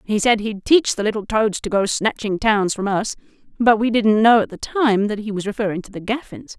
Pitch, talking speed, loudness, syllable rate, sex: 215 Hz, 245 wpm, -19 LUFS, 5.3 syllables/s, female